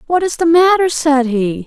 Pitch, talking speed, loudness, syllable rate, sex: 300 Hz, 215 wpm, -13 LUFS, 4.6 syllables/s, female